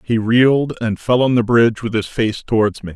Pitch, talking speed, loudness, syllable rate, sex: 115 Hz, 245 wpm, -16 LUFS, 5.4 syllables/s, male